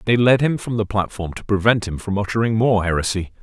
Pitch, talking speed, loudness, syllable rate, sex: 105 Hz, 230 wpm, -19 LUFS, 5.9 syllables/s, male